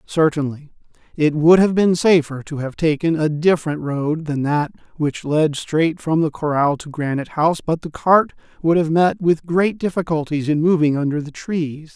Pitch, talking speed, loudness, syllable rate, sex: 155 Hz, 185 wpm, -19 LUFS, 4.8 syllables/s, male